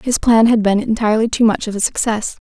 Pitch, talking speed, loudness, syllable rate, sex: 220 Hz, 245 wpm, -15 LUFS, 6.1 syllables/s, female